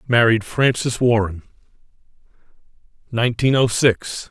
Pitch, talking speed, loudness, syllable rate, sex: 115 Hz, 85 wpm, -18 LUFS, 4.5 syllables/s, male